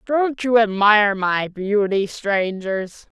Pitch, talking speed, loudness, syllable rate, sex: 210 Hz, 115 wpm, -19 LUFS, 3.3 syllables/s, female